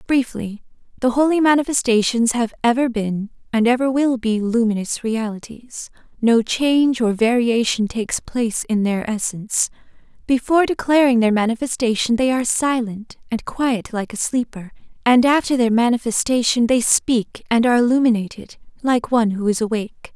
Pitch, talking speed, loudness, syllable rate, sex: 235 Hz, 145 wpm, -18 LUFS, 5.2 syllables/s, female